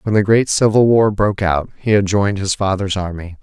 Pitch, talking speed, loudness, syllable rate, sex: 100 Hz, 230 wpm, -16 LUFS, 5.6 syllables/s, male